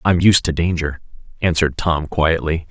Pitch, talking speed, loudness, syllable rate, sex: 80 Hz, 155 wpm, -18 LUFS, 5.0 syllables/s, male